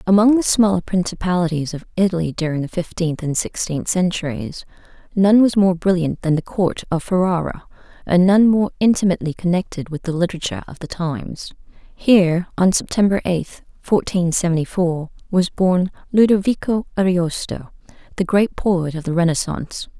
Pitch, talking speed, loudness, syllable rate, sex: 180 Hz, 145 wpm, -19 LUFS, 5.3 syllables/s, female